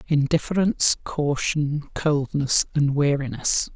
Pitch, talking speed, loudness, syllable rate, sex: 145 Hz, 80 wpm, -22 LUFS, 3.9 syllables/s, male